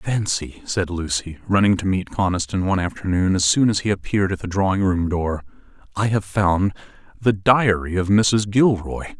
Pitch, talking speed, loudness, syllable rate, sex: 95 Hz, 175 wpm, -20 LUFS, 5.0 syllables/s, male